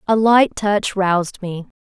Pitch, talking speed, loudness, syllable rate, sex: 200 Hz, 165 wpm, -17 LUFS, 3.9 syllables/s, female